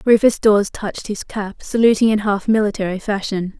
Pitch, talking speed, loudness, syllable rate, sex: 210 Hz, 165 wpm, -18 LUFS, 5.6 syllables/s, female